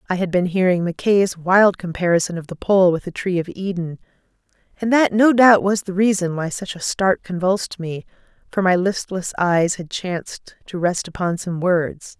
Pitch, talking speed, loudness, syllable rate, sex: 185 Hz, 190 wpm, -19 LUFS, 4.8 syllables/s, female